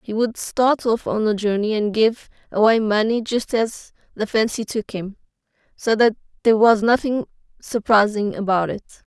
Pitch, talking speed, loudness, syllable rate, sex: 220 Hz, 165 wpm, -20 LUFS, 4.8 syllables/s, female